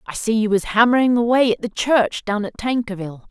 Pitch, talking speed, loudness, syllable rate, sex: 220 Hz, 220 wpm, -18 LUFS, 5.6 syllables/s, female